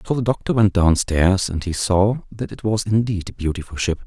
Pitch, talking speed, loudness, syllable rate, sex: 100 Hz, 220 wpm, -20 LUFS, 5.2 syllables/s, male